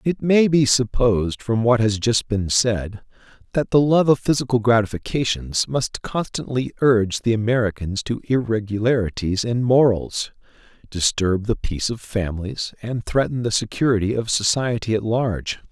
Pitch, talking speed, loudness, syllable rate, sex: 115 Hz, 145 wpm, -20 LUFS, 4.9 syllables/s, male